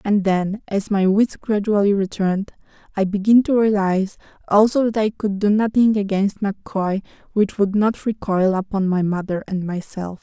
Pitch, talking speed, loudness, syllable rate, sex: 200 Hz, 165 wpm, -19 LUFS, 4.8 syllables/s, female